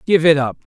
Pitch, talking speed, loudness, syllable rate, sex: 155 Hz, 240 wpm, -16 LUFS, 6.1 syllables/s, male